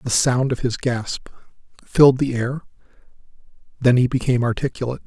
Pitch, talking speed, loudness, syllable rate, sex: 125 Hz, 140 wpm, -20 LUFS, 5.8 syllables/s, male